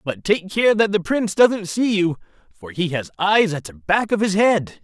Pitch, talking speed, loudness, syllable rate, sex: 190 Hz, 235 wpm, -19 LUFS, 4.6 syllables/s, male